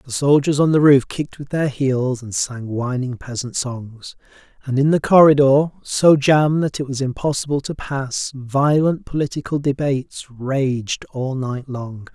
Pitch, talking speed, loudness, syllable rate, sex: 135 Hz, 165 wpm, -19 LUFS, 4.3 syllables/s, male